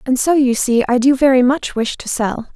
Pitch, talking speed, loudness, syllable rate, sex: 255 Hz, 260 wpm, -15 LUFS, 5.0 syllables/s, female